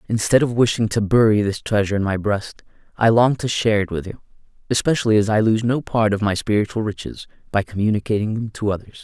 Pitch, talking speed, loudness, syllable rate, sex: 110 Hz, 215 wpm, -19 LUFS, 6.3 syllables/s, male